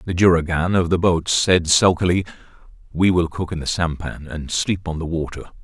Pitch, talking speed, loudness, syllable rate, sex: 85 Hz, 190 wpm, -19 LUFS, 5.2 syllables/s, male